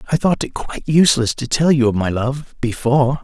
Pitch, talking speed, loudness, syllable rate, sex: 130 Hz, 205 wpm, -17 LUFS, 5.8 syllables/s, male